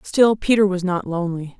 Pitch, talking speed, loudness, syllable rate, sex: 190 Hz, 190 wpm, -19 LUFS, 5.4 syllables/s, female